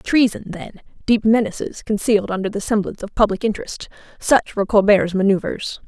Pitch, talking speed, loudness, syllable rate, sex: 210 Hz, 135 wpm, -19 LUFS, 5.7 syllables/s, female